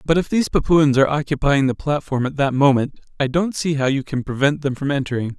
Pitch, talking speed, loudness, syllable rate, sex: 140 Hz, 235 wpm, -19 LUFS, 6.1 syllables/s, male